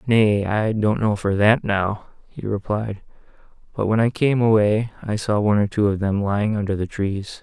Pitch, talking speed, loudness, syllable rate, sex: 105 Hz, 200 wpm, -20 LUFS, 4.8 syllables/s, male